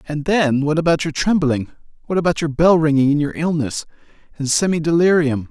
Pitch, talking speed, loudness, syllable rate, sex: 155 Hz, 185 wpm, -17 LUFS, 5.6 syllables/s, male